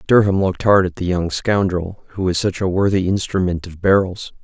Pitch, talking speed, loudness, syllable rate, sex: 95 Hz, 205 wpm, -18 LUFS, 5.4 syllables/s, male